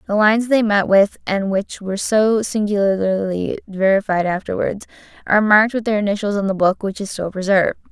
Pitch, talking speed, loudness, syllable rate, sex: 200 Hz, 180 wpm, -18 LUFS, 5.5 syllables/s, female